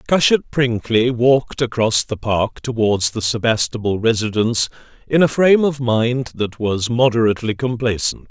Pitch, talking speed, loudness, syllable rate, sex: 120 Hz, 135 wpm, -17 LUFS, 4.9 syllables/s, male